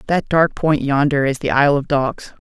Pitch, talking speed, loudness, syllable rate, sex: 145 Hz, 220 wpm, -17 LUFS, 5.0 syllables/s, male